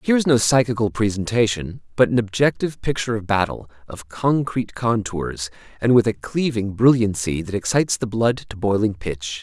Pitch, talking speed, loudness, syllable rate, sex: 110 Hz, 165 wpm, -20 LUFS, 5.4 syllables/s, male